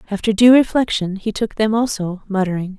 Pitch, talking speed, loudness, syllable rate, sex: 210 Hz, 175 wpm, -17 LUFS, 5.6 syllables/s, female